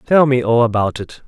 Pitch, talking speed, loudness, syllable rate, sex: 120 Hz, 235 wpm, -15 LUFS, 5.3 syllables/s, male